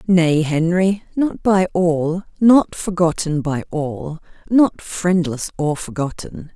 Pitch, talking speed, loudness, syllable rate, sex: 170 Hz, 120 wpm, -18 LUFS, 3.4 syllables/s, female